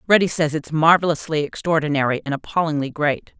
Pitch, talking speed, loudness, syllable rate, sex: 155 Hz, 140 wpm, -20 LUFS, 6.0 syllables/s, female